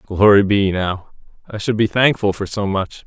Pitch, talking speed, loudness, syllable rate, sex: 100 Hz, 195 wpm, -17 LUFS, 4.6 syllables/s, male